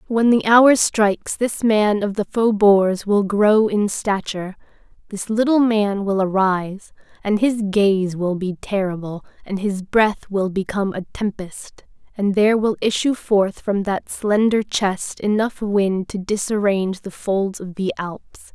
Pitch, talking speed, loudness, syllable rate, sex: 205 Hz, 160 wpm, -19 LUFS, 4.1 syllables/s, female